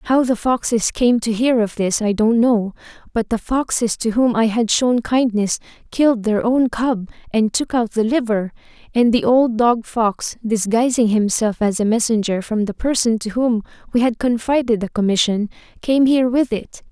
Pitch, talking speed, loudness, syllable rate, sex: 230 Hz, 190 wpm, -18 LUFS, 4.7 syllables/s, female